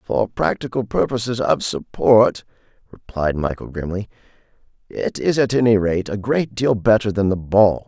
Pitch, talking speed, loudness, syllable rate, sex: 105 Hz, 150 wpm, -19 LUFS, 4.6 syllables/s, male